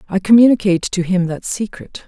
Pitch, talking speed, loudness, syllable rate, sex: 195 Hz, 175 wpm, -15 LUFS, 5.9 syllables/s, female